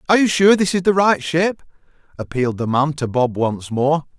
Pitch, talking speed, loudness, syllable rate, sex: 155 Hz, 215 wpm, -18 LUFS, 5.3 syllables/s, male